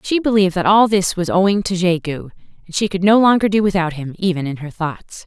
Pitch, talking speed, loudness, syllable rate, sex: 185 Hz, 250 wpm, -17 LUFS, 6.1 syllables/s, female